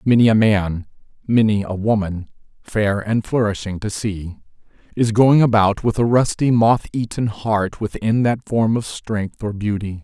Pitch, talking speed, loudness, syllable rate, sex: 110 Hz, 160 wpm, -18 LUFS, 4.3 syllables/s, male